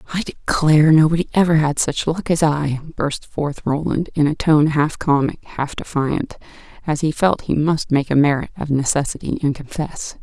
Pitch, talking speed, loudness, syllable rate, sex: 155 Hz, 180 wpm, -19 LUFS, 4.8 syllables/s, female